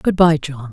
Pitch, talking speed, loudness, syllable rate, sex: 150 Hz, 250 wpm, -16 LUFS, 4.5 syllables/s, female